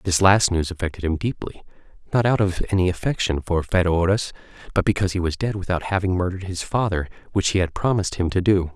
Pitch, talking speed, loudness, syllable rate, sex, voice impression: 95 Hz, 205 wpm, -22 LUFS, 6.4 syllables/s, male, masculine, adult-like, tensed, slightly hard, clear, fluent, cool, intellectual, calm, wild, slightly lively, slightly strict